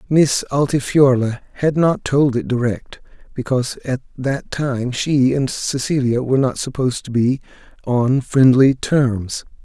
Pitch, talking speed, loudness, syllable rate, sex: 130 Hz, 135 wpm, -18 LUFS, 4.1 syllables/s, male